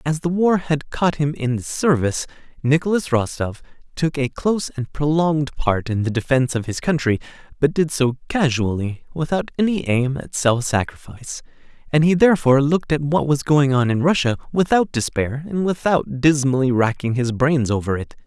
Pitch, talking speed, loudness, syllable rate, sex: 140 Hz, 175 wpm, -20 LUFS, 5.3 syllables/s, male